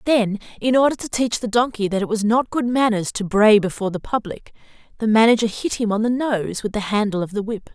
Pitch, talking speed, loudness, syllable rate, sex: 220 Hz, 240 wpm, -20 LUFS, 5.8 syllables/s, female